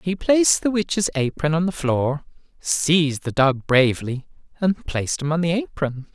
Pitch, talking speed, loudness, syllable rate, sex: 160 Hz, 175 wpm, -21 LUFS, 4.8 syllables/s, male